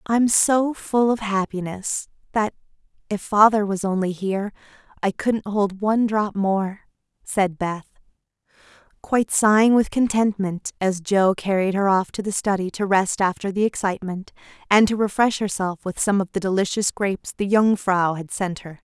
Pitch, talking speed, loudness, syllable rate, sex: 200 Hz, 160 wpm, -21 LUFS, 4.7 syllables/s, female